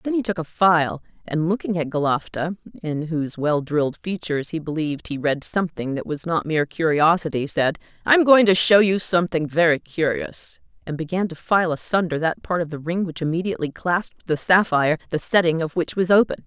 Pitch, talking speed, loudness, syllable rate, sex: 165 Hz, 200 wpm, -21 LUFS, 5.7 syllables/s, female